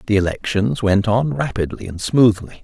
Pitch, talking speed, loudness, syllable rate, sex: 105 Hz, 160 wpm, -18 LUFS, 4.9 syllables/s, male